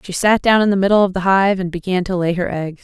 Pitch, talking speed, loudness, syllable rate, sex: 190 Hz, 315 wpm, -16 LUFS, 6.2 syllables/s, female